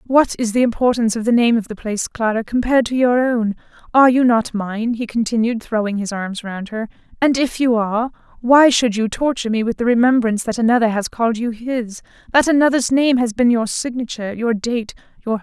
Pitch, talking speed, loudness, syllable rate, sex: 235 Hz, 205 wpm, -17 LUFS, 6.0 syllables/s, female